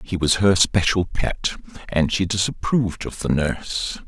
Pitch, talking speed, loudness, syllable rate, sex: 95 Hz, 160 wpm, -21 LUFS, 4.5 syllables/s, male